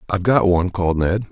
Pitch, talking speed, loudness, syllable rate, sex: 95 Hz, 230 wpm, -18 LUFS, 7.2 syllables/s, male